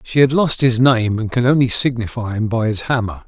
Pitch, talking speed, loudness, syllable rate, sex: 120 Hz, 240 wpm, -17 LUFS, 5.4 syllables/s, male